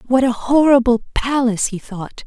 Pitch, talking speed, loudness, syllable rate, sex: 245 Hz, 160 wpm, -16 LUFS, 5.1 syllables/s, female